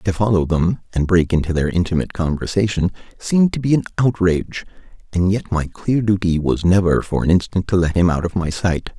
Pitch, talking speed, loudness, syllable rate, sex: 90 Hz, 205 wpm, -18 LUFS, 5.7 syllables/s, male